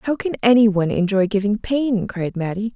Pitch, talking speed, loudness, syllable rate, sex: 210 Hz, 195 wpm, -19 LUFS, 5.5 syllables/s, female